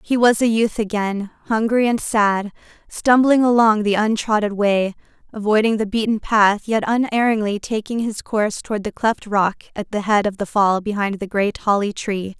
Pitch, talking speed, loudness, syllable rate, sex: 215 Hz, 180 wpm, -19 LUFS, 4.9 syllables/s, female